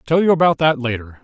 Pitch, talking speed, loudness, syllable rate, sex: 140 Hz, 245 wpm, -16 LUFS, 6.4 syllables/s, male